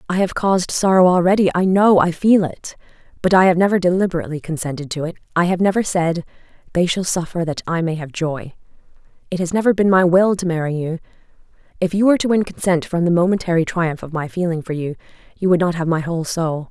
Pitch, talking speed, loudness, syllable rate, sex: 175 Hz, 210 wpm, -18 LUFS, 6.3 syllables/s, female